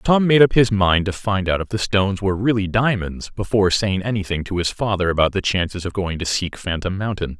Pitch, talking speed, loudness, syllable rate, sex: 100 Hz, 235 wpm, -19 LUFS, 5.7 syllables/s, male